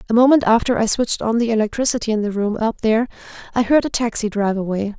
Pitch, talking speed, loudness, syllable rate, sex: 225 Hz, 230 wpm, -18 LUFS, 7.0 syllables/s, female